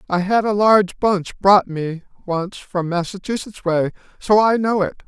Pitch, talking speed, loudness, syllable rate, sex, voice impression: 190 Hz, 175 wpm, -18 LUFS, 4.5 syllables/s, male, masculine, adult-like, slightly bright, refreshing, unique, slightly kind